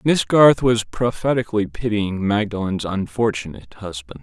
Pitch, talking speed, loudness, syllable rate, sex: 105 Hz, 115 wpm, -19 LUFS, 4.9 syllables/s, male